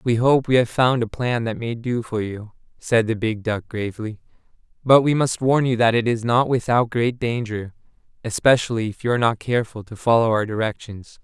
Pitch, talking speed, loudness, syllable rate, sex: 115 Hz, 210 wpm, -20 LUFS, 5.3 syllables/s, male